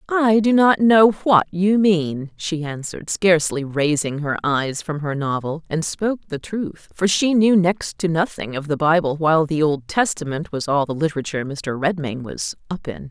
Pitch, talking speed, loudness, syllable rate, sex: 165 Hz, 190 wpm, -20 LUFS, 4.7 syllables/s, female